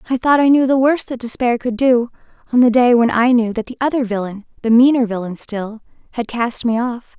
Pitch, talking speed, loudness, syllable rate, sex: 240 Hz, 235 wpm, -16 LUFS, 5.5 syllables/s, female